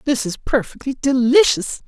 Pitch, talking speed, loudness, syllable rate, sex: 260 Hz, 130 wpm, -18 LUFS, 4.7 syllables/s, male